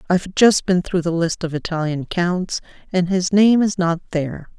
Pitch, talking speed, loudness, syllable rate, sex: 180 Hz, 195 wpm, -19 LUFS, 4.9 syllables/s, female